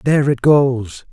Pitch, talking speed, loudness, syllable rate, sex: 130 Hz, 160 wpm, -14 LUFS, 4.1 syllables/s, male